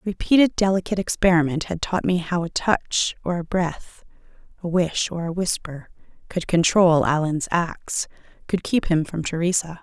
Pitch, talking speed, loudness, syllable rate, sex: 175 Hz, 160 wpm, -22 LUFS, 4.7 syllables/s, female